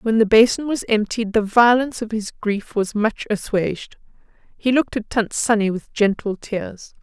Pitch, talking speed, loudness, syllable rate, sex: 220 Hz, 180 wpm, -19 LUFS, 4.8 syllables/s, female